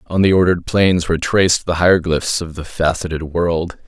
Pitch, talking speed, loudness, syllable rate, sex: 85 Hz, 185 wpm, -16 LUFS, 5.4 syllables/s, male